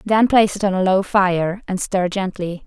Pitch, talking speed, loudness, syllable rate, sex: 190 Hz, 225 wpm, -18 LUFS, 4.8 syllables/s, female